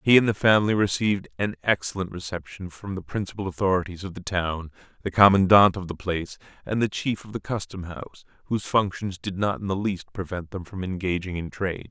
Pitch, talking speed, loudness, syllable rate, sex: 95 Hz, 200 wpm, -25 LUFS, 6.0 syllables/s, male